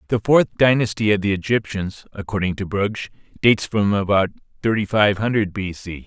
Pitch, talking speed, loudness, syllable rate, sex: 105 Hz, 170 wpm, -20 LUFS, 5.1 syllables/s, male